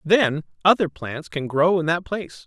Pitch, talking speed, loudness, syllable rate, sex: 165 Hz, 195 wpm, -22 LUFS, 4.6 syllables/s, male